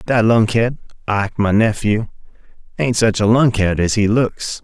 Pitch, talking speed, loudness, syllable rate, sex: 110 Hz, 155 wpm, -16 LUFS, 4.5 syllables/s, male